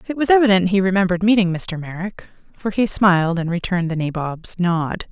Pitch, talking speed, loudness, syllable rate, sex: 185 Hz, 190 wpm, -18 LUFS, 5.8 syllables/s, female